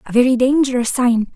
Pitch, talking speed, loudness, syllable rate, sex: 250 Hz, 180 wpm, -16 LUFS, 5.8 syllables/s, female